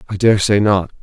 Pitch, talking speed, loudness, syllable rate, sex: 100 Hz, 235 wpm, -14 LUFS, 5.3 syllables/s, male